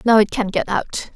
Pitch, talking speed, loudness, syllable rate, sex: 215 Hz, 260 wpm, -19 LUFS, 4.8 syllables/s, female